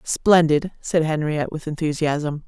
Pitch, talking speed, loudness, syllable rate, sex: 155 Hz, 120 wpm, -21 LUFS, 4.4 syllables/s, female